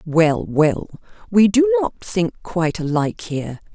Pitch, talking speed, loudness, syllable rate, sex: 180 Hz, 145 wpm, -19 LUFS, 4.1 syllables/s, female